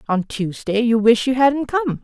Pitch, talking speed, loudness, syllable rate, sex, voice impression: 240 Hz, 205 wpm, -18 LUFS, 4.3 syllables/s, female, feminine, adult-like, slightly fluent, slightly sincere, slightly friendly, slightly sweet